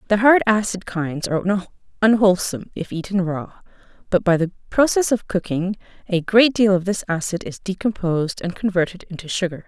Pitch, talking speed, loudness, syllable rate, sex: 190 Hz, 165 wpm, -20 LUFS, 5.7 syllables/s, female